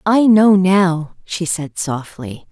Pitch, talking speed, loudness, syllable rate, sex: 175 Hz, 145 wpm, -15 LUFS, 3.0 syllables/s, female